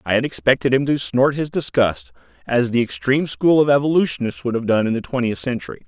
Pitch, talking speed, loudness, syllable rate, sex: 125 Hz, 215 wpm, -19 LUFS, 6.1 syllables/s, male